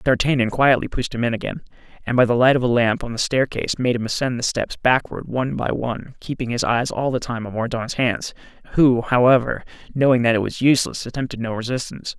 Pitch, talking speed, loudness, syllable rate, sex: 125 Hz, 215 wpm, -20 LUFS, 6.1 syllables/s, male